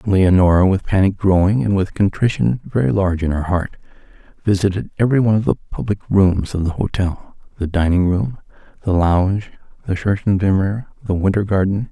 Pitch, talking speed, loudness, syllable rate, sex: 100 Hz, 155 wpm, -18 LUFS, 5.4 syllables/s, male